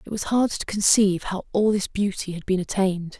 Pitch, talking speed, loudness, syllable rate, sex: 195 Hz, 225 wpm, -23 LUFS, 5.7 syllables/s, female